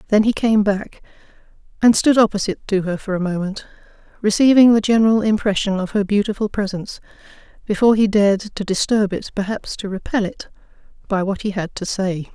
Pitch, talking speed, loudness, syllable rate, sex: 205 Hz, 175 wpm, -18 LUFS, 5.9 syllables/s, female